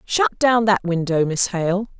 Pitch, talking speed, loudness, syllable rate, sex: 195 Hz, 180 wpm, -19 LUFS, 4.0 syllables/s, female